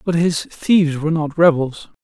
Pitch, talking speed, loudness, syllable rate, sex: 160 Hz, 175 wpm, -17 LUFS, 4.9 syllables/s, male